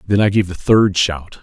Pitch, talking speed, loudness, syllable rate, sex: 95 Hz, 255 wpm, -15 LUFS, 4.5 syllables/s, male